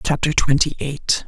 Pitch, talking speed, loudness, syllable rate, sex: 145 Hz, 140 wpm, -19 LUFS, 4.5 syllables/s, female